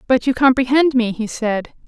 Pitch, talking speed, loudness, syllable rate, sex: 250 Hz, 190 wpm, -17 LUFS, 4.9 syllables/s, female